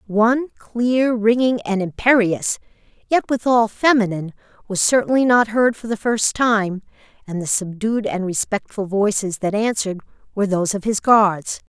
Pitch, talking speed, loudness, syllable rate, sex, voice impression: 215 Hz, 150 wpm, -19 LUFS, 4.8 syllables/s, female, very feminine, slightly young, thin, tensed, slightly powerful, bright, hard, clear, fluent, cute, intellectual, refreshing, sincere, slightly calm, friendly, reassuring, very unique, slightly elegant, slightly wild, slightly sweet, lively, strict, slightly intense, sharp, light